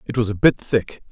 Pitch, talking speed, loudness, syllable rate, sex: 115 Hz, 270 wpm, -19 LUFS, 5.4 syllables/s, male